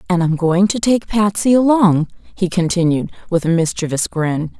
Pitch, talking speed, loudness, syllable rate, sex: 180 Hz, 170 wpm, -16 LUFS, 4.7 syllables/s, female